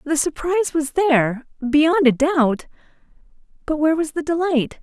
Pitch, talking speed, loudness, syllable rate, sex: 300 Hz, 125 wpm, -19 LUFS, 4.7 syllables/s, female